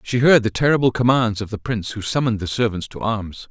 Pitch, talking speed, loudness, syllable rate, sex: 115 Hz, 240 wpm, -19 LUFS, 6.2 syllables/s, male